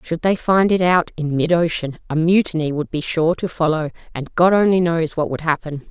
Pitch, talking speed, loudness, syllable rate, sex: 165 Hz, 225 wpm, -18 LUFS, 5.2 syllables/s, female